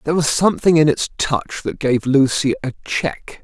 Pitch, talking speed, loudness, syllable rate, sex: 140 Hz, 190 wpm, -18 LUFS, 4.9 syllables/s, male